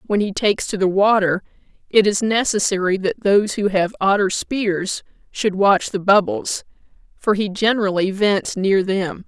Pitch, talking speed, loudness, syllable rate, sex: 200 Hz, 160 wpm, -18 LUFS, 4.6 syllables/s, female